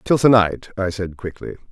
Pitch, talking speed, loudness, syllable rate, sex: 100 Hz, 210 wpm, -19 LUFS, 5.0 syllables/s, male